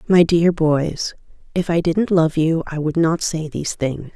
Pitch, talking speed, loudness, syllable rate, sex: 165 Hz, 200 wpm, -19 LUFS, 4.3 syllables/s, female